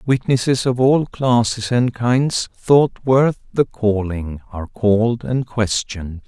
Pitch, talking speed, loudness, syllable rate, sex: 120 Hz, 135 wpm, -18 LUFS, 3.8 syllables/s, male